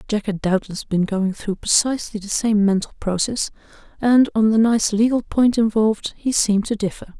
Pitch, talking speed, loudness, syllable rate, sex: 215 Hz, 185 wpm, -19 LUFS, 5.2 syllables/s, female